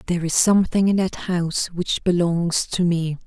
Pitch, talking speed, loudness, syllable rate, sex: 175 Hz, 185 wpm, -20 LUFS, 5.1 syllables/s, female